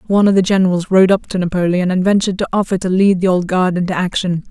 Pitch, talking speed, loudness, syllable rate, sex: 185 Hz, 255 wpm, -15 LUFS, 6.8 syllables/s, female